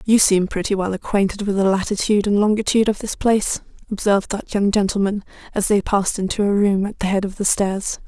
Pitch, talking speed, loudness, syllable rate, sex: 200 Hz, 215 wpm, -19 LUFS, 6.1 syllables/s, female